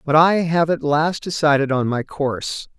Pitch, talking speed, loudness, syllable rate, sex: 155 Hz, 195 wpm, -19 LUFS, 4.7 syllables/s, male